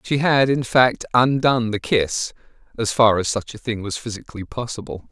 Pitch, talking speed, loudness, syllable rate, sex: 115 Hz, 190 wpm, -20 LUFS, 5.1 syllables/s, male